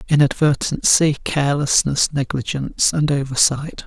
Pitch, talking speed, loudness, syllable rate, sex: 140 Hz, 80 wpm, -18 LUFS, 4.7 syllables/s, male